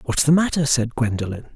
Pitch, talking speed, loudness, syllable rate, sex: 135 Hz, 195 wpm, -20 LUFS, 5.8 syllables/s, male